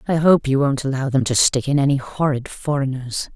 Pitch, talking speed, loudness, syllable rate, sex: 140 Hz, 215 wpm, -19 LUFS, 5.4 syllables/s, female